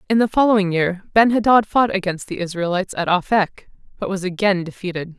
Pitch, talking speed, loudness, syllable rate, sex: 190 Hz, 185 wpm, -19 LUFS, 6.1 syllables/s, female